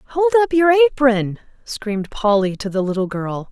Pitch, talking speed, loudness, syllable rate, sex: 245 Hz, 170 wpm, -18 LUFS, 4.6 syllables/s, female